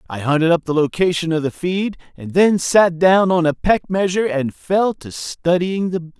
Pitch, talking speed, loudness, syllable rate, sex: 170 Hz, 215 wpm, -17 LUFS, 4.9 syllables/s, male